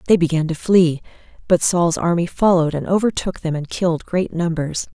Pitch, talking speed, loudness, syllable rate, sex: 170 Hz, 180 wpm, -18 LUFS, 5.4 syllables/s, female